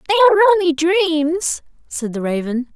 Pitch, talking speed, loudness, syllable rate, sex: 325 Hz, 150 wpm, -16 LUFS, 5.4 syllables/s, female